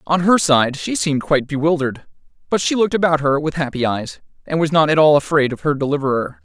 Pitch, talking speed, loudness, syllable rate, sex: 155 Hz, 225 wpm, -17 LUFS, 6.4 syllables/s, male